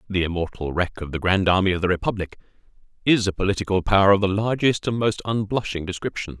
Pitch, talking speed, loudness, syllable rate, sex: 95 Hz, 195 wpm, -22 LUFS, 6.4 syllables/s, male